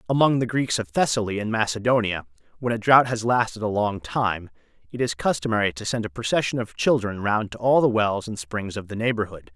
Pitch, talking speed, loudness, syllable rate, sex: 110 Hz, 215 wpm, -23 LUFS, 5.7 syllables/s, male